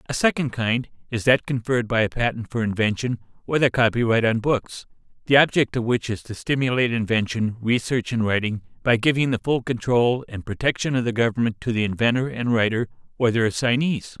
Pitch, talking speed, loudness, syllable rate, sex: 120 Hz, 190 wpm, -22 LUFS, 5.8 syllables/s, male